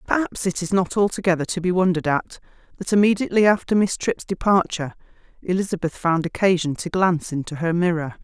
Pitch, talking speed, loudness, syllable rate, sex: 180 Hz, 170 wpm, -21 LUFS, 6.2 syllables/s, female